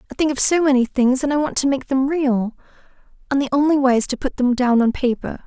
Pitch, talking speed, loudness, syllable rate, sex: 265 Hz, 265 wpm, -18 LUFS, 6.2 syllables/s, female